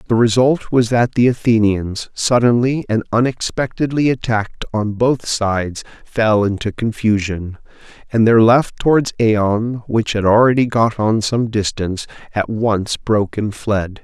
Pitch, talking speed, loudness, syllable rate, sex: 110 Hz, 140 wpm, -16 LUFS, 4.4 syllables/s, male